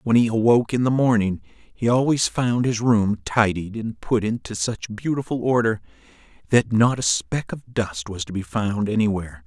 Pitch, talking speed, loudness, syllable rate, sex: 110 Hz, 185 wpm, -22 LUFS, 4.8 syllables/s, male